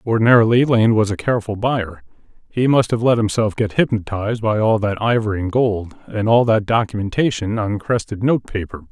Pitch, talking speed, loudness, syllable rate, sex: 110 Hz, 175 wpm, -18 LUFS, 5.6 syllables/s, male